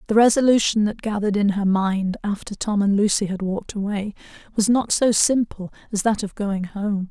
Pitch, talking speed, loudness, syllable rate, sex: 205 Hz, 195 wpm, -21 LUFS, 5.3 syllables/s, female